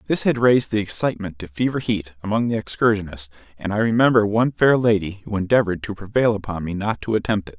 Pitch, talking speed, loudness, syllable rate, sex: 105 Hz, 215 wpm, -21 LUFS, 6.6 syllables/s, male